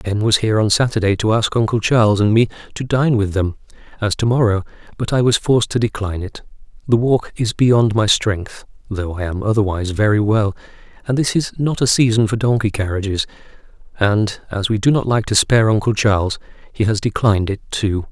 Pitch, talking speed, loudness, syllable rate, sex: 110 Hz, 200 wpm, -17 LUFS, 5.2 syllables/s, male